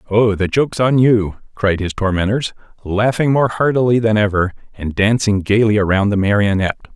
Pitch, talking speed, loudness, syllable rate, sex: 105 Hz, 165 wpm, -16 LUFS, 5.4 syllables/s, male